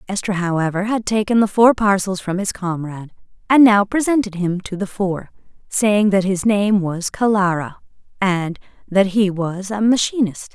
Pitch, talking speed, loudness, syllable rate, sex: 195 Hz, 165 wpm, -18 LUFS, 4.8 syllables/s, female